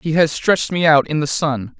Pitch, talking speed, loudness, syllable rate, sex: 155 Hz, 270 wpm, -17 LUFS, 5.2 syllables/s, male